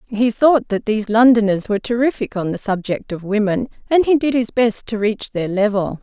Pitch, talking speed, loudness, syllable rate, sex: 220 Hz, 210 wpm, -18 LUFS, 5.4 syllables/s, female